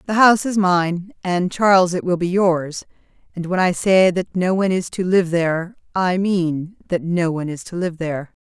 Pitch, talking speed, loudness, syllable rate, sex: 180 Hz, 200 wpm, -19 LUFS, 4.9 syllables/s, female